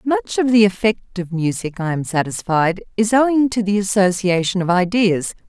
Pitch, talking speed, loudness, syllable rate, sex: 195 Hz, 175 wpm, -18 LUFS, 4.9 syllables/s, female